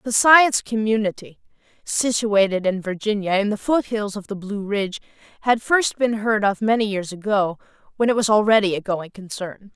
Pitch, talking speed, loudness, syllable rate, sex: 210 Hz, 170 wpm, -20 LUFS, 5.1 syllables/s, female